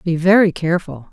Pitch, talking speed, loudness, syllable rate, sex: 175 Hz, 160 wpm, -16 LUFS, 5.6 syllables/s, female